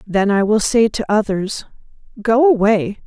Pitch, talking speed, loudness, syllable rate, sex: 215 Hz, 155 wpm, -16 LUFS, 4.4 syllables/s, female